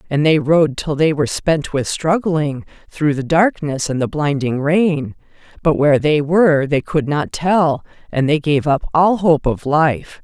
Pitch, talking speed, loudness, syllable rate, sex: 155 Hz, 190 wpm, -16 LUFS, 4.3 syllables/s, female